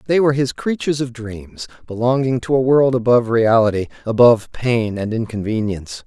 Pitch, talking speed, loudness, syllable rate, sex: 120 Hz, 160 wpm, -17 LUFS, 5.6 syllables/s, male